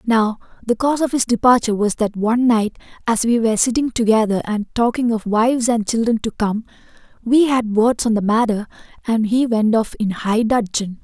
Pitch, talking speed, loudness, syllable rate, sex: 225 Hz, 195 wpm, -18 LUFS, 5.3 syllables/s, female